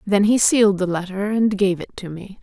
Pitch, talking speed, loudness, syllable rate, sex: 200 Hz, 245 wpm, -18 LUFS, 5.4 syllables/s, female